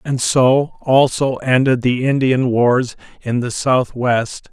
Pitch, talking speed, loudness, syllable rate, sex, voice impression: 125 Hz, 135 wpm, -16 LUFS, 3.4 syllables/s, male, very masculine, middle-aged, slightly thick, slightly powerful, intellectual, slightly calm, slightly mature